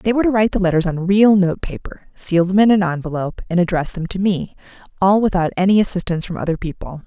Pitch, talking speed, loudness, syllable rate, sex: 185 Hz, 230 wpm, -17 LUFS, 6.6 syllables/s, female